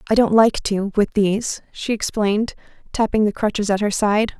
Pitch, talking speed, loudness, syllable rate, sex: 210 Hz, 175 wpm, -19 LUFS, 5.5 syllables/s, female